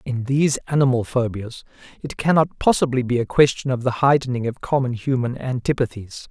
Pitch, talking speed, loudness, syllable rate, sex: 130 Hz, 160 wpm, -20 LUFS, 5.5 syllables/s, male